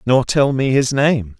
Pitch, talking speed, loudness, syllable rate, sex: 130 Hz, 215 wpm, -16 LUFS, 3.9 syllables/s, male